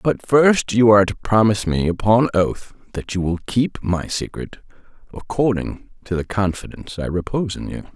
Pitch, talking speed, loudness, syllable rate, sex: 105 Hz, 175 wpm, -19 LUFS, 5.1 syllables/s, male